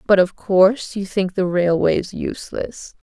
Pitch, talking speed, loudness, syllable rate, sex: 190 Hz, 155 wpm, -19 LUFS, 4.2 syllables/s, female